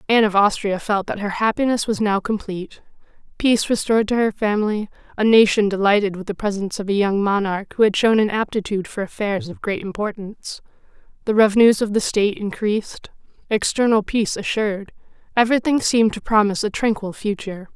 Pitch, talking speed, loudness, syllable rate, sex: 210 Hz, 170 wpm, -19 LUFS, 6.2 syllables/s, female